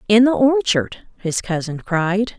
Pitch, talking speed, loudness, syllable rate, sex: 210 Hz, 150 wpm, -18 LUFS, 4.0 syllables/s, female